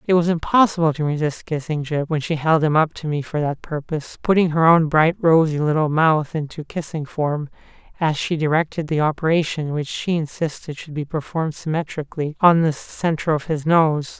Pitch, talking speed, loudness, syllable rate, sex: 155 Hz, 190 wpm, -20 LUFS, 5.3 syllables/s, male